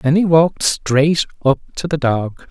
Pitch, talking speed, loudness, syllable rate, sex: 150 Hz, 190 wpm, -16 LUFS, 4.2 syllables/s, male